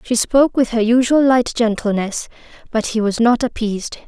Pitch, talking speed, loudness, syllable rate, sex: 230 Hz, 175 wpm, -17 LUFS, 5.3 syllables/s, female